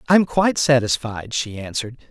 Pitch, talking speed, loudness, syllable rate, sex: 130 Hz, 140 wpm, -20 LUFS, 5.5 syllables/s, male